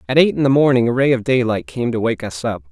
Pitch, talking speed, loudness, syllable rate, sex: 120 Hz, 310 wpm, -17 LUFS, 6.4 syllables/s, male